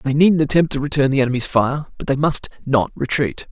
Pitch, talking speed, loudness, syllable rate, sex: 140 Hz, 220 wpm, -18 LUFS, 5.7 syllables/s, male